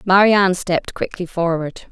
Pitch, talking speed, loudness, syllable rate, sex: 180 Hz, 155 wpm, -18 LUFS, 5.6 syllables/s, female